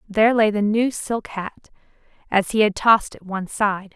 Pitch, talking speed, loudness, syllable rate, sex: 210 Hz, 195 wpm, -20 LUFS, 5.0 syllables/s, female